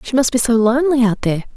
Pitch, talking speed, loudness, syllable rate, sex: 245 Hz, 270 wpm, -15 LUFS, 7.3 syllables/s, female